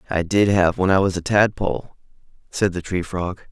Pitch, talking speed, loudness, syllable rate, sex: 90 Hz, 205 wpm, -20 LUFS, 5.2 syllables/s, male